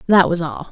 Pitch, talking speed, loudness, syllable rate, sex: 175 Hz, 250 wpm, -17 LUFS, 5.6 syllables/s, female